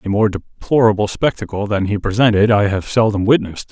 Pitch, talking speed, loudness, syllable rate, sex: 105 Hz, 180 wpm, -16 LUFS, 5.8 syllables/s, male